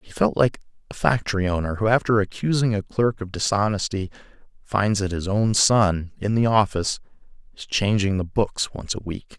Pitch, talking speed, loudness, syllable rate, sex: 105 Hz, 180 wpm, -22 LUFS, 5.1 syllables/s, male